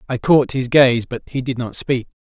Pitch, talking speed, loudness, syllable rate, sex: 125 Hz, 245 wpm, -17 LUFS, 4.8 syllables/s, male